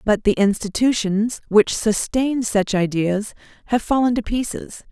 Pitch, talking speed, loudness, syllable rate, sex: 220 Hz, 135 wpm, -20 LUFS, 4.4 syllables/s, female